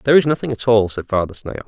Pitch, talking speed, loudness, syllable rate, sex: 115 Hz, 285 wpm, -18 LUFS, 7.5 syllables/s, male